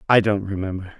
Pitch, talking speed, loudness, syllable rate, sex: 100 Hz, 180 wpm, -22 LUFS, 6.4 syllables/s, male